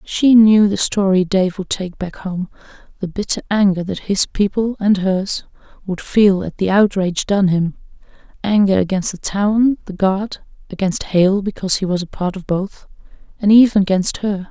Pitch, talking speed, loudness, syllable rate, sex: 195 Hz, 170 wpm, -17 LUFS, 4.7 syllables/s, female